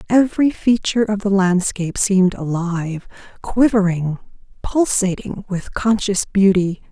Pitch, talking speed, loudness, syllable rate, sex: 195 Hz, 105 wpm, -18 LUFS, 4.6 syllables/s, female